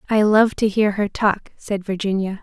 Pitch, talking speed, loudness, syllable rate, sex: 205 Hz, 200 wpm, -19 LUFS, 4.7 syllables/s, female